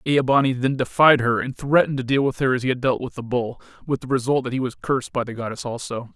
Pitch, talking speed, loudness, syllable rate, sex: 130 Hz, 285 wpm, -21 LUFS, 6.4 syllables/s, male